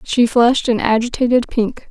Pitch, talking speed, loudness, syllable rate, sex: 235 Hz, 160 wpm, -15 LUFS, 5.1 syllables/s, female